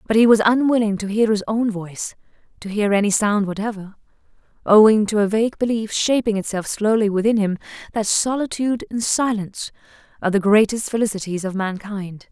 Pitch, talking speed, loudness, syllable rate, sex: 210 Hz, 155 wpm, -19 LUFS, 5.8 syllables/s, female